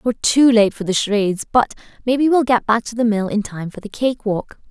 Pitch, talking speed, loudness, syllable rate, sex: 225 Hz, 255 wpm, -18 LUFS, 5.9 syllables/s, female